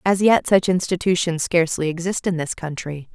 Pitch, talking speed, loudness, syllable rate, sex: 175 Hz, 170 wpm, -20 LUFS, 5.3 syllables/s, female